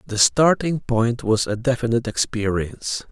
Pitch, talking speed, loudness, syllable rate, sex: 120 Hz, 135 wpm, -20 LUFS, 4.8 syllables/s, male